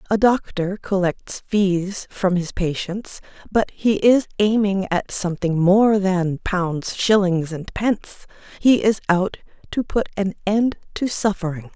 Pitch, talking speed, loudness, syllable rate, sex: 195 Hz, 145 wpm, -20 LUFS, 3.9 syllables/s, female